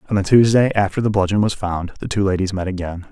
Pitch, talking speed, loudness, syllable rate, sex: 100 Hz, 250 wpm, -18 LUFS, 6.5 syllables/s, male